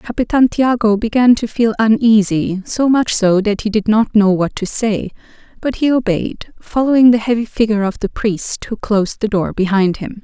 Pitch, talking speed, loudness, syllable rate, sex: 220 Hz, 195 wpm, -15 LUFS, 4.8 syllables/s, female